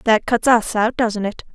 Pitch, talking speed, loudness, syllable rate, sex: 220 Hz, 235 wpm, -18 LUFS, 4.2 syllables/s, female